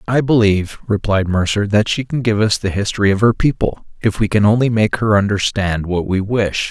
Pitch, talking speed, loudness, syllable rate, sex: 105 Hz, 215 wpm, -16 LUFS, 5.4 syllables/s, male